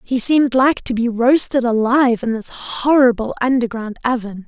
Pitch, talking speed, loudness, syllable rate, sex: 245 Hz, 160 wpm, -16 LUFS, 5.0 syllables/s, female